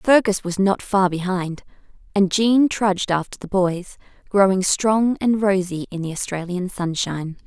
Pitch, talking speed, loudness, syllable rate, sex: 190 Hz, 155 wpm, -20 LUFS, 4.5 syllables/s, female